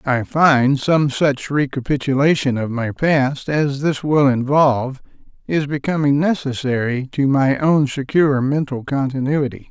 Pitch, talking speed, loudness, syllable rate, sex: 140 Hz, 130 wpm, -18 LUFS, 4.3 syllables/s, male